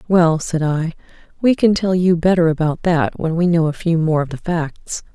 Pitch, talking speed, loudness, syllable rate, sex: 165 Hz, 220 wpm, -17 LUFS, 4.8 syllables/s, female